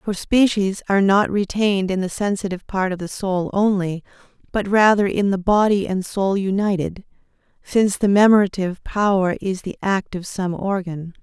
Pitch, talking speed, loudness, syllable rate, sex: 195 Hz, 165 wpm, -19 LUFS, 5.1 syllables/s, female